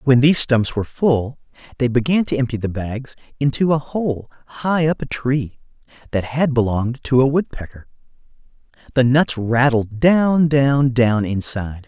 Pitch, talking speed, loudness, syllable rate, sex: 130 Hz, 145 wpm, -18 LUFS, 4.7 syllables/s, male